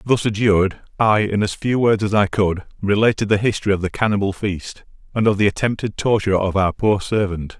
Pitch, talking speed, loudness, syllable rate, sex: 100 Hz, 205 wpm, -19 LUFS, 5.7 syllables/s, male